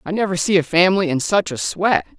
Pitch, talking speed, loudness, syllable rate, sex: 180 Hz, 245 wpm, -18 LUFS, 6.0 syllables/s, male